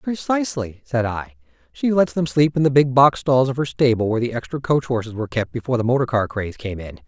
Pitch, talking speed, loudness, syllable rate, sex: 125 Hz, 245 wpm, -20 LUFS, 6.2 syllables/s, male